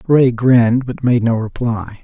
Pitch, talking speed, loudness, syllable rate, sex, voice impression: 120 Hz, 175 wpm, -15 LUFS, 4.2 syllables/s, male, masculine, middle-aged, slightly muffled, sincere, slightly calm, slightly elegant, kind